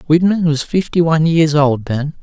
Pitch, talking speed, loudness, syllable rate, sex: 155 Hz, 190 wpm, -14 LUFS, 4.7 syllables/s, male